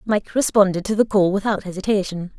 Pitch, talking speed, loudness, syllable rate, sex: 200 Hz, 175 wpm, -20 LUFS, 5.8 syllables/s, female